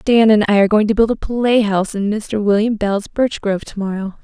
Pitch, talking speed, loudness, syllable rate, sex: 210 Hz, 225 wpm, -16 LUFS, 5.9 syllables/s, female